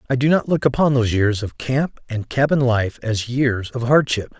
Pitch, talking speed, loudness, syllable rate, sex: 125 Hz, 220 wpm, -19 LUFS, 4.9 syllables/s, male